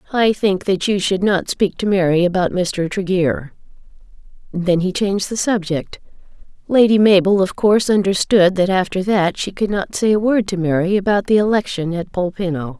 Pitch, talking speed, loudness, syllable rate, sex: 190 Hz, 180 wpm, -17 LUFS, 5.1 syllables/s, female